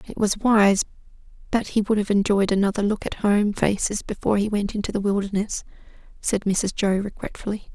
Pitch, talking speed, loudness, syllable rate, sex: 205 Hz, 180 wpm, -23 LUFS, 5.6 syllables/s, female